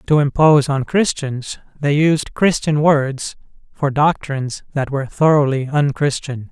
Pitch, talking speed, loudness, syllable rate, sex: 145 Hz, 130 wpm, -17 LUFS, 4.3 syllables/s, male